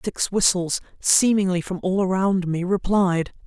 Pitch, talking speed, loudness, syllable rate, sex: 185 Hz, 105 wpm, -21 LUFS, 4.2 syllables/s, female